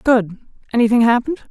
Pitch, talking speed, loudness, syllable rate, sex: 240 Hz, 120 wpm, -16 LUFS, 8.0 syllables/s, female